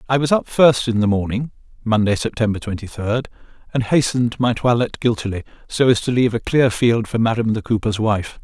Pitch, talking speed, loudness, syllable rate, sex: 115 Hz, 200 wpm, -18 LUFS, 5.1 syllables/s, male